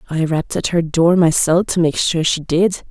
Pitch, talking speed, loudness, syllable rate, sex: 165 Hz, 230 wpm, -16 LUFS, 4.9 syllables/s, female